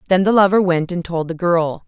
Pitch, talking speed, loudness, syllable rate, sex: 180 Hz, 255 wpm, -17 LUFS, 5.5 syllables/s, female